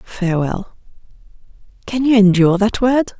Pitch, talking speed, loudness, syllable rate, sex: 210 Hz, 115 wpm, -15 LUFS, 5.0 syllables/s, female